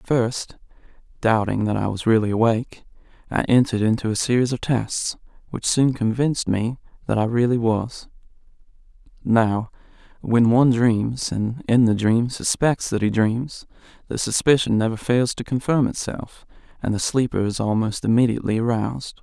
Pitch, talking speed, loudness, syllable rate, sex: 115 Hz, 155 wpm, -21 LUFS, 5.0 syllables/s, male